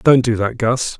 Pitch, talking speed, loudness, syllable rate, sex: 120 Hz, 240 wpm, -17 LUFS, 4.5 syllables/s, male